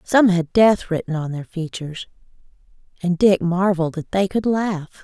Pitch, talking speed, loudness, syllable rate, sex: 180 Hz, 165 wpm, -20 LUFS, 4.9 syllables/s, female